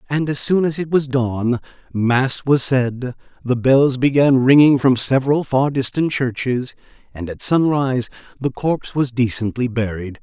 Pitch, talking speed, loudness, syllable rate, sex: 130 Hz, 160 wpm, -18 LUFS, 4.5 syllables/s, male